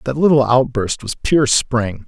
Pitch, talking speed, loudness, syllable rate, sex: 125 Hz, 175 wpm, -16 LUFS, 4.1 syllables/s, male